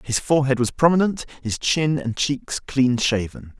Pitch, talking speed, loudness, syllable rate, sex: 135 Hz, 165 wpm, -21 LUFS, 4.6 syllables/s, male